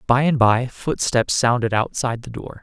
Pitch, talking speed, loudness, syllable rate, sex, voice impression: 120 Hz, 185 wpm, -19 LUFS, 4.8 syllables/s, male, masculine, adult-like, refreshing, friendly, kind